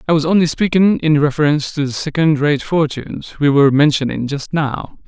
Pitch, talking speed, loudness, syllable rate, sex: 150 Hz, 190 wpm, -15 LUFS, 5.6 syllables/s, male